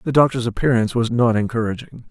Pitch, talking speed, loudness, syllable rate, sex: 120 Hz, 170 wpm, -19 LUFS, 6.6 syllables/s, male